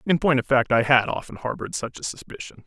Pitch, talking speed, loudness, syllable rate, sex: 135 Hz, 250 wpm, -22 LUFS, 6.3 syllables/s, male